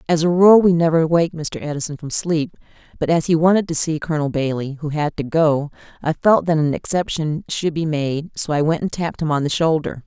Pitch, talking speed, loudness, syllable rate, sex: 160 Hz, 230 wpm, -19 LUFS, 5.6 syllables/s, female